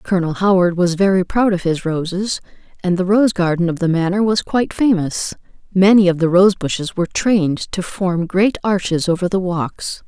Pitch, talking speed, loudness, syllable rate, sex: 185 Hz, 190 wpm, -17 LUFS, 5.2 syllables/s, female